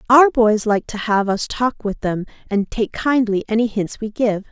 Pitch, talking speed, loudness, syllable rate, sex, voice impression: 220 Hz, 215 wpm, -19 LUFS, 4.5 syllables/s, female, very feminine, adult-like, slightly middle-aged, thin, slightly relaxed, slightly weak, slightly dark, soft, clear, fluent, slightly cute, intellectual, refreshing, slightly sincere, very calm, friendly, reassuring, unique, elegant, sweet, kind, slightly sharp, light